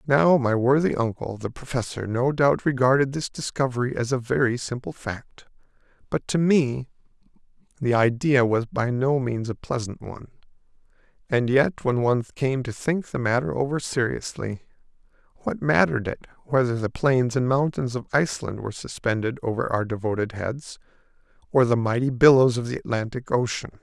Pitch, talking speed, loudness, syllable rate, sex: 125 Hz, 160 wpm, -24 LUFS, 5.3 syllables/s, male